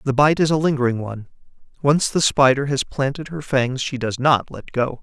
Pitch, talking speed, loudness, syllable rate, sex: 135 Hz, 215 wpm, -19 LUFS, 5.3 syllables/s, male